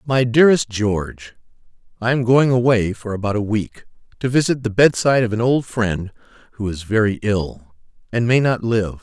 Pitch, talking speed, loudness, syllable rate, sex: 115 Hz, 175 wpm, -18 LUFS, 5.1 syllables/s, male